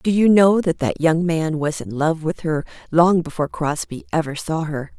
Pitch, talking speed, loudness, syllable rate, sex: 160 Hz, 215 wpm, -20 LUFS, 4.8 syllables/s, female